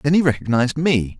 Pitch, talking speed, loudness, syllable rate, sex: 135 Hz, 200 wpm, -18 LUFS, 6.1 syllables/s, male